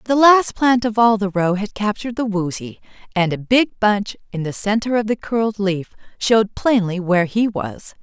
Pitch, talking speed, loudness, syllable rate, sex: 210 Hz, 200 wpm, -18 LUFS, 5.0 syllables/s, female